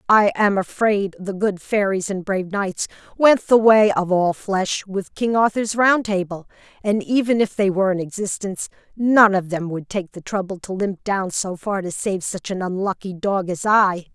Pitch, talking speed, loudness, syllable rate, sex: 195 Hz, 200 wpm, -20 LUFS, 4.6 syllables/s, female